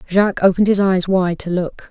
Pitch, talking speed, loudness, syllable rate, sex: 185 Hz, 220 wpm, -16 LUFS, 5.9 syllables/s, female